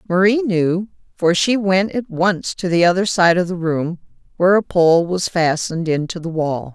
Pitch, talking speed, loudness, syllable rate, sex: 180 Hz, 195 wpm, -17 LUFS, 4.7 syllables/s, female